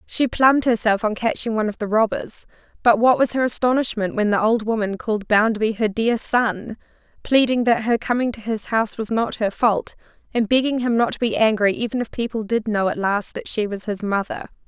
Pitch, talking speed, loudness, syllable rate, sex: 220 Hz, 215 wpm, -20 LUFS, 5.6 syllables/s, female